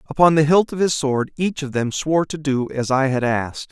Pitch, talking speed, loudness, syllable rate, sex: 145 Hz, 260 wpm, -19 LUFS, 5.5 syllables/s, male